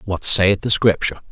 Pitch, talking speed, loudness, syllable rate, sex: 95 Hz, 185 wpm, -16 LUFS, 4.5 syllables/s, male